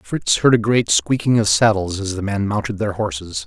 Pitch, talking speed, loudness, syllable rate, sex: 100 Hz, 225 wpm, -18 LUFS, 5.0 syllables/s, male